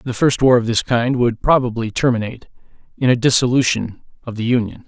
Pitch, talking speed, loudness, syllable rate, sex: 120 Hz, 185 wpm, -17 LUFS, 5.9 syllables/s, male